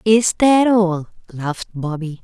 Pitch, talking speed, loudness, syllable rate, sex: 190 Hz, 135 wpm, -17 LUFS, 3.9 syllables/s, female